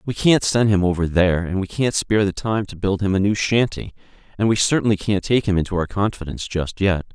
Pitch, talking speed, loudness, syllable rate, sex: 100 Hz, 245 wpm, -20 LUFS, 6.0 syllables/s, male